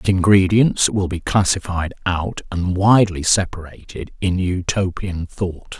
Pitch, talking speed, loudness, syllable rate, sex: 95 Hz, 125 wpm, -18 LUFS, 4.2 syllables/s, male